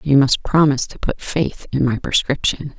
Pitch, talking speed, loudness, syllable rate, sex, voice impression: 140 Hz, 195 wpm, -18 LUFS, 4.9 syllables/s, female, feminine, middle-aged, slightly relaxed, slightly weak, clear, raspy, nasal, calm, reassuring, elegant, slightly sharp, modest